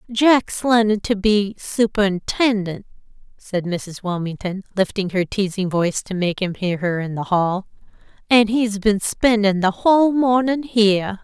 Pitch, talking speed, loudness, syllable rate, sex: 205 Hz, 150 wpm, -19 LUFS, 4.3 syllables/s, female